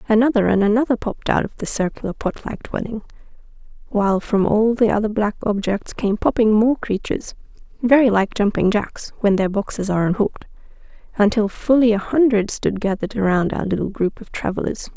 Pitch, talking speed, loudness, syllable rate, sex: 215 Hz, 165 wpm, -19 LUFS, 5.7 syllables/s, female